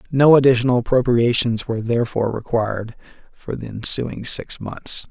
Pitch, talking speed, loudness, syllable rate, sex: 120 Hz, 130 wpm, -19 LUFS, 5.3 syllables/s, male